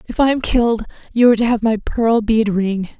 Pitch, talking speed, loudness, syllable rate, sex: 225 Hz, 240 wpm, -16 LUFS, 5.8 syllables/s, female